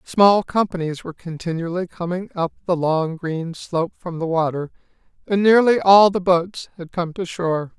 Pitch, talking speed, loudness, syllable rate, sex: 175 Hz, 170 wpm, -20 LUFS, 4.9 syllables/s, male